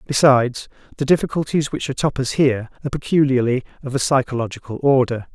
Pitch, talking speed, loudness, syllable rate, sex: 135 Hz, 145 wpm, -19 LUFS, 6.4 syllables/s, male